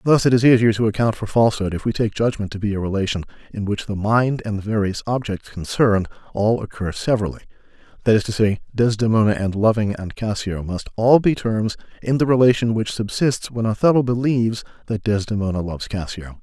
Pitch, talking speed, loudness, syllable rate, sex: 110 Hz, 195 wpm, -20 LUFS, 6.0 syllables/s, male